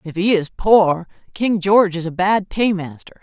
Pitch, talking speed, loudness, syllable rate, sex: 190 Hz, 185 wpm, -17 LUFS, 4.5 syllables/s, female